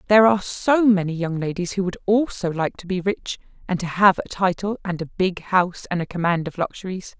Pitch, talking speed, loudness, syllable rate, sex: 185 Hz, 225 wpm, -22 LUFS, 5.7 syllables/s, female